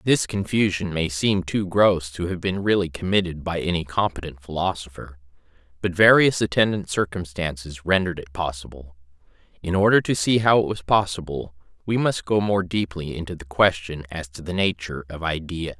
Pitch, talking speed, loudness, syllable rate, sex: 90 Hz, 165 wpm, -22 LUFS, 5.3 syllables/s, male